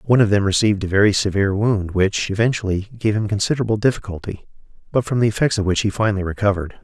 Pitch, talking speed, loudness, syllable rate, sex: 105 Hz, 200 wpm, -19 LUFS, 7.2 syllables/s, male